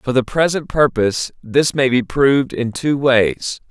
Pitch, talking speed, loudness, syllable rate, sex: 130 Hz, 180 wpm, -17 LUFS, 4.3 syllables/s, male